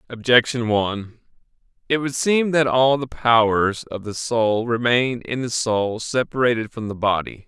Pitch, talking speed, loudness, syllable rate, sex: 120 Hz, 160 wpm, -20 LUFS, 4.4 syllables/s, male